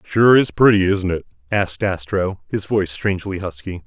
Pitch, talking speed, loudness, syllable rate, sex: 95 Hz, 170 wpm, -18 LUFS, 5.3 syllables/s, male